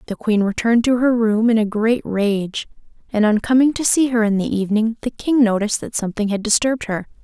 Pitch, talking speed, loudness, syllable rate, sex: 225 Hz, 225 wpm, -18 LUFS, 5.9 syllables/s, female